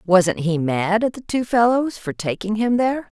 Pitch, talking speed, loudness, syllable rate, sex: 210 Hz, 205 wpm, -20 LUFS, 4.6 syllables/s, female